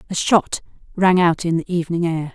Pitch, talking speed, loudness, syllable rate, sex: 170 Hz, 205 wpm, -18 LUFS, 5.5 syllables/s, female